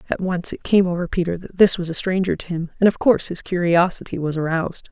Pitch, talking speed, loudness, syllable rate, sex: 175 Hz, 245 wpm, -20 LUFS, 6.3 syllables/s, female